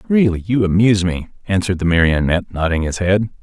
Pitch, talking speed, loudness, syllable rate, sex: 95 Hz, 175 wpm, -17 LUFS, 6.6 syllables/s, male